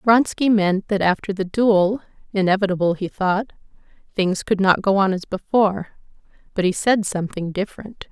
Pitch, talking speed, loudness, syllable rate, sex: 195 Hz, 140 wpm, -20 LUFS, 5.1 syllables/s, female